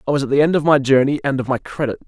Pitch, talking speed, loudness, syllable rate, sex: 140 Hz, 345 wpm, -17 LUFS, 7.7 syllables/s, male